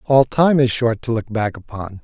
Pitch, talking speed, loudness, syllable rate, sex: 120 Hz, 235 wpm, -18 LUFS, 4.7 syllables/s, male